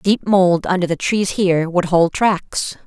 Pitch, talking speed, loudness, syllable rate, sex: 180 Hz, 190 wpm, -17 LUFS, 4.1 syllables/s, female